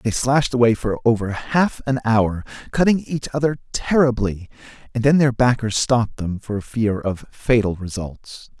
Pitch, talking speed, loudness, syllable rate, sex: 120 Hz, 160 wpm, -20 LUFS, 4.5 syllables/s, male